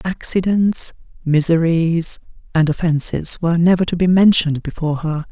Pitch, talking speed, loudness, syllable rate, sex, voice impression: 165 Hz, 125 wpm, -17 LUFS, 5.1 syllables/s, female, very feminine, very middle-aged, very thin, relaxed, weak, dark, soft, slightly muffled, fluent, raspy, slightly cool, intellectual, refreshing, very calm, friendly, reassuring, very unique, elegant, slightly wild, sweet, slightly lively, very kind, very modest, light